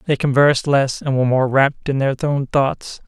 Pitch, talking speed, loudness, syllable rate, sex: 135 Hz, 215 wpm, -17 LUFS, 5.0 syllables/s, male